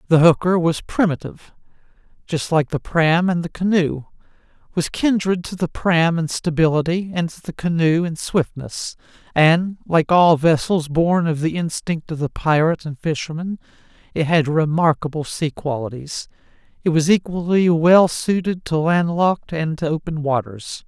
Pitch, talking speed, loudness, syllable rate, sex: 165 Hz, 150 wpm, -19 LUFS, 4.6 syllables/s, male